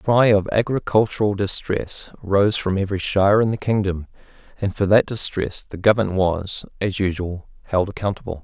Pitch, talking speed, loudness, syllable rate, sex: 100 Hz, 165 wpm, -20 LUFS, 5.3 syllables/s, male